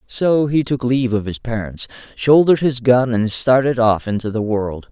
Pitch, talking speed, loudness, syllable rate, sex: 120 Hz, 195 wpm, -17 LUFS, 4.9 syllables/s, male